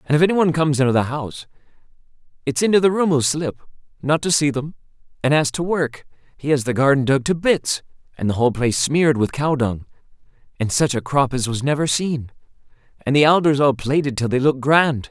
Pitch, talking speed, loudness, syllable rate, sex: 140 Hz, 215 wpm, -19 LUFS, 6.0 syllables/s, male